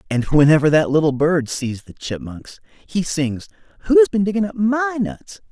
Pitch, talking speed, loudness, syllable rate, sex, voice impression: 170 Hz, 165 wpm, -18 LUFS, 4.5 syllables/s, male, masculine, adult-like, clear, refreshing, slightly sincere